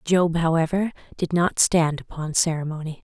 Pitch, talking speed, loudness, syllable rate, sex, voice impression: 165 Hz, 135 wpm, -22 LUFS, 4.8 syllables/s, female, feminine, adult-like, relaxed, weak, soft, raspy, intellectual, calm, reassuring, elegant, kind, modest